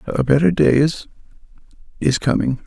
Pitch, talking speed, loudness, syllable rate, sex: 150 Hz, 110 wpm, -17 LUFS, 5.0 syllables/s, male